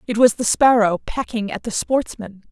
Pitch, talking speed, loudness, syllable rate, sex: 225 Hz, 190 wpm, -18 LUFS, 4.9 syllables/s, female